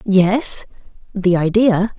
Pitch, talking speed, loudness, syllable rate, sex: 200 Hz, 90 wpm, -16 LUFS, 2.9 syllables/s, female